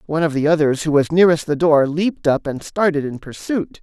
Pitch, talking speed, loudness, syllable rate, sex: 155 Hz, 235 wpm, -17 LUFS, 6.0 syllables/s, male